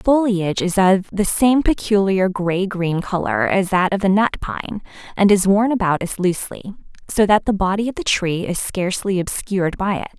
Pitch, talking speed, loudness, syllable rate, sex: 190 Hz, 200 wpm, -18 LUFS, 5.1 syllables/s, female